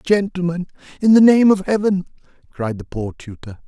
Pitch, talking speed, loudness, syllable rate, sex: 175 Hz, 165 wpm, -17 LUFS, 5.1 syllables/s, male